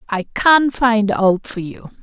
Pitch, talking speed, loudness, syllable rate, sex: 225 Hz, 180 wpm, -16 LUFS, 3.4 syllables/s, female